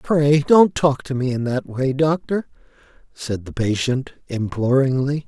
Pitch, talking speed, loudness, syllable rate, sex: 135 Hz, 150 wpm, -20 LUFS, 4.1 syllables/s, male